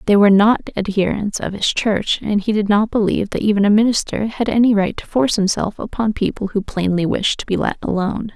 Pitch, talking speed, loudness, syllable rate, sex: 210 Hz, 225 wpm, -17 LUFS, 5.9 syllables/s, female